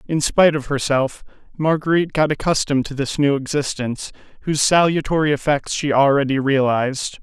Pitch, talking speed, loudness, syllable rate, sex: 145 Hz, 140 wpm, -18 LUFS, 5.9 syllables/s, male